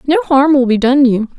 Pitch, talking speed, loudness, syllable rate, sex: 255 Hz, 260 wpm, -11 LUFS, 5.2 syllables/s, female